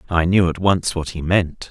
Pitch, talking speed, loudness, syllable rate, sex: 90 Hz, 245 wpm, -19 LUFS, 4.6 syllables/s, male